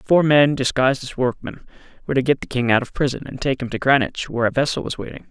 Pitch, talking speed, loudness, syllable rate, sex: 130 Hz, 260 wpm, -20 LUFS, 6.8 syllables/s, male